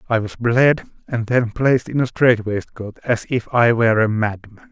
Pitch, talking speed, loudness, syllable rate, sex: 120 Hz, 205 wpm, -18 LUFS, 4.8 syllables/s, male